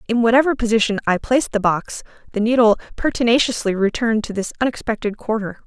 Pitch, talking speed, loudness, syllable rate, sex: 225 Hz, 160 wpm, -19 LUFS, 6.5 syllables/s, female